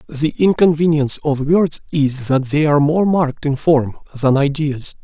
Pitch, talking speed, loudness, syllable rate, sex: 150 Hz, 165 wpm, -16 LUFS, 4.8 syllables/s, male